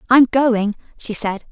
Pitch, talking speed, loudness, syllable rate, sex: 230 Hz, 160 wpm, -17 LUFS, 3.9 syllables/s, female